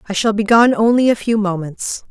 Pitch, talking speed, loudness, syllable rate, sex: 210 Hz, 230 wpm, -15 LUFS, 5.3 syllables/s, female